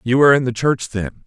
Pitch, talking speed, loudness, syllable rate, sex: 125 Hz, 285 wpm, -17 LUFS, 6.9 syllables/s, male